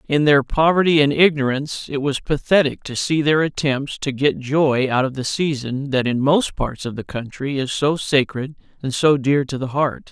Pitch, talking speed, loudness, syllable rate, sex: 140 Hz, 210 wpm, -19 LUFS, 4.8 syllables/s, male